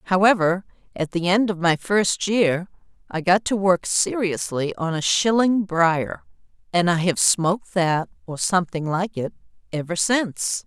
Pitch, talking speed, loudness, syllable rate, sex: 185 Hz, 160 wpm, -21 LUFS, 4.3 syllables/s, female